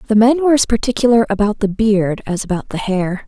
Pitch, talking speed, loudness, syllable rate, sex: 215 Hz, 220 wpm, -15 LUFS, 6.0 syllables/s, female